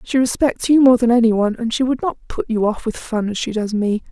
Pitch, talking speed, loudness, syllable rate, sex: 235 Hz, 290 wpm, -17 LUFS, 6.0 syllables/s, female